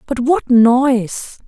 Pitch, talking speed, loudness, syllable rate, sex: 250 Hz, 120 wpm, -13 LUFS, 3.2 syllables/s, female